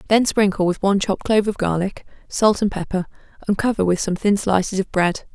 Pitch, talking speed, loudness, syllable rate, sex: 195 Hz, 215 wpm, -20 LUFS, 6.0 syllables/s, female